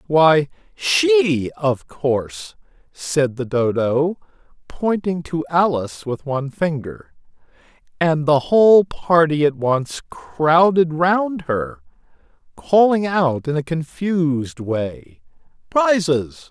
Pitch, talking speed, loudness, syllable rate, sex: 155 Hz, 105 wpm, -18 LUFS, 3.3 syllables/s, male